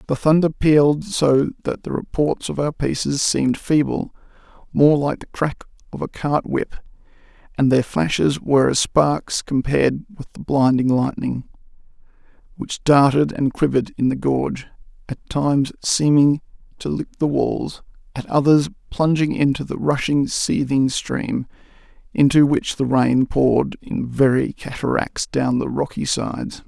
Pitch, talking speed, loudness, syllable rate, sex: 140 Hz, 145 wpm, -19 LUFS, 4.4 syllables/s, male